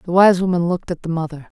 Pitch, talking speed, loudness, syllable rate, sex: 175 Hz, 265 wpm, -18 LUFS, 7.2 syllables/s, female